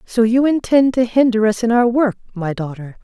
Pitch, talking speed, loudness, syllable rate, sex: 230 Hz, 215 wpm, -16 LUFS, 5.2 syllables/s, female